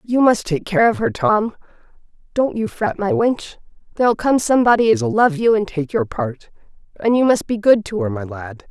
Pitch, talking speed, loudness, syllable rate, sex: 230 Hz, 195 wpm, -18 LUFS, 5.0 syllables/s, female